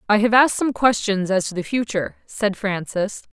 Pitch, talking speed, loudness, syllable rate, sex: 210 Hz, 195 wpm, -20 LUFS, 5.4 syllables/s, female